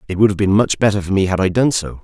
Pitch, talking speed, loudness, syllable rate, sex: 100 Hz, 355 wpm, -16 LUFS, 7.0 syllables/s, male